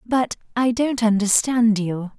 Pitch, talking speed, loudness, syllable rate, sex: 225 Hz, 135 wpm, -20 LUFS, 3.8 syllables/s, female